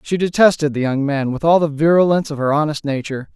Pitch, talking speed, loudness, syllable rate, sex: 150 Hz, 235 wpm, -17 LUFS, 6.5 syllables/s, male